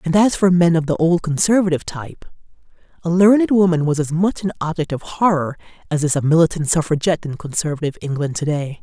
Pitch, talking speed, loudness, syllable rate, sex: 165 Hz, 195 wpm, -18 LUFS, 6.4 syllables/s, female